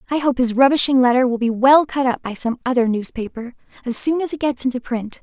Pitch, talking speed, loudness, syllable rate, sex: 255 Hz, 240 wpm, -18 LUFS, 6.0 syllables/s, female